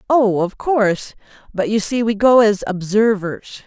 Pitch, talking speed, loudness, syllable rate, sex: 215 Hz, 165 wpm, -17 LUFS, 4.3 syllables/s, female